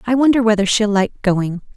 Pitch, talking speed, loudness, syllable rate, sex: 215 Hz, 205 wpm, -16 LUFS, 5.7 syllables/s, female